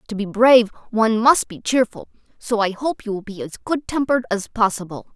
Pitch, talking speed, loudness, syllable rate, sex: 220 Hz, 210 wpm, -19 LUFS, 5.7 syllables/s, female